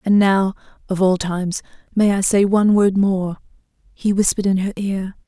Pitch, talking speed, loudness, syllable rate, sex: 195 Hz, 160 wpm, -18 LUFS, 5.1 syllables/s, female